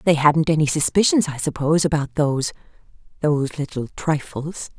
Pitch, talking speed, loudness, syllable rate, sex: 150 Hz, 125 wpm, -20 LUFS, 5.5 syllables/s, female